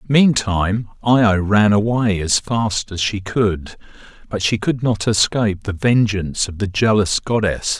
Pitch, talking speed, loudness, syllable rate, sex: 105 Hz, 160 wpm, -17 LUFS, 4.3 syllables/s, male